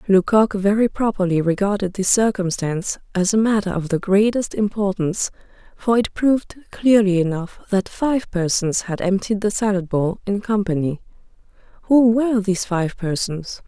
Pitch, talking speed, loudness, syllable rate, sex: 200 Hz, 145 wpm, -19 LUFS, 4.9 syllables/s, female